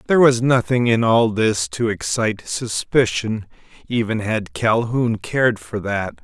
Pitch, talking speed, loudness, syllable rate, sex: 115 Hz, 135 wpm, -19 LUFS, 4.3 syllables/s, male